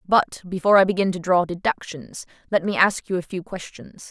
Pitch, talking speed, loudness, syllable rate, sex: 185 Hz, 205 wpm, -21 LUFS, 5.4 syllables/s, female